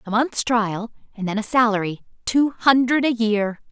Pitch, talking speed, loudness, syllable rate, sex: 225 Hz, 160 wpm, -20 LUFS, 4.6 syllables/s, female